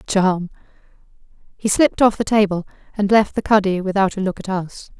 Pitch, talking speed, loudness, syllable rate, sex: 200 Hz, 180 wpm, -18 LUFS, 5.6 syllables/s, female